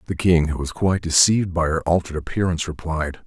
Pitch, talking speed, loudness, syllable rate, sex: 85 Hz, 200 wpm, -20 LUFS, 6.6 syllables/s, male